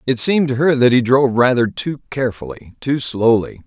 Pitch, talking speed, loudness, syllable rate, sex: 125 Hz, 195 wpm, -16 LUFS, 5.6 syllables/s, male